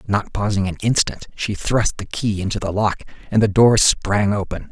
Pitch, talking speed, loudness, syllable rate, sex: 105 Hz, 205 wpm, -19 LUFS, 4.9 syllables/s, male